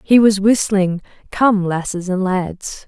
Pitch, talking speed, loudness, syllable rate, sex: 195 Hz, 145 wpm, -16 LUFS, 3.6 syllables/s, female